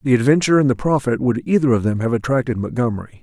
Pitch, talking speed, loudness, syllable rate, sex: 125 Hz, 225 wpm, -18 LUFS, 7.0 syllables/s, male